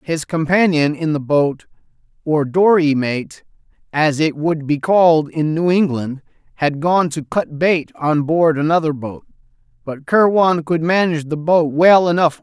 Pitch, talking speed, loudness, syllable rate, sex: 160 Hz, 155 wpm, -16 LUFS, 4.6 syllables/s, male